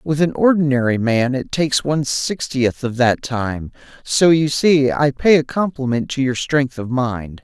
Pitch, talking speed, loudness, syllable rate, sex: 135 Hz, 185 wpm, -17 LUFS, 4.4 syllables/s, male